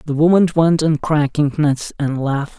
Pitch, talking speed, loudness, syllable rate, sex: 150 Hz, 185 wpm, -16 LUFS, 4.9 syllables/s, male